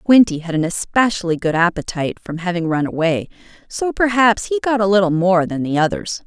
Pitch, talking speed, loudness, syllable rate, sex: 190 Hz, 190 wpm, -17 LUFS, 5.5 syllables/s, female